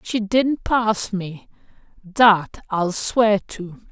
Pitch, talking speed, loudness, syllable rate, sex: 205 Hz, 120 wpm, -19 LUFS, 2.5 syllables/s, female